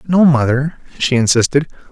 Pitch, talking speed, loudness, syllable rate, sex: 140 Hz, 125 wpm, -14 LUFS, 5.3 syllables/s, male